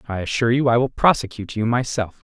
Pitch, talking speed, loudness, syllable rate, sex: 120 Hz, 210 wpm, -20 LUFS, 6.7 syllables/s, male